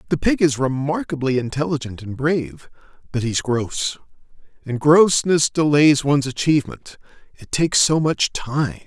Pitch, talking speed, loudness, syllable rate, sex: 140 Hz, 130 wpm, -19 LUFS, 4.8 syllables/s, male